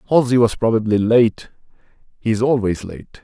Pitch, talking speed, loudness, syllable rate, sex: 110 Hz, 130 wpm, -17 LUFS, 5.2 syllables/s, male